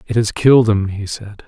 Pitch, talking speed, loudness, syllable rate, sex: 105 Hz, 245 wpm, -15 LUFS, 5.3 syllables/s, male